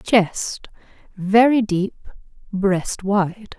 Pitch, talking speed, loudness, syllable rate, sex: 200 Hz, 65 wpm, -20 LUFS, 2.2 syllables/s, female